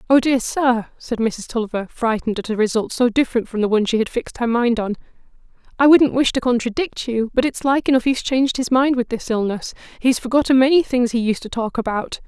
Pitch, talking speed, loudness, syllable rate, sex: 240 Hz, 230 wpm, -19 LUFS, 6.0 syllables/s, female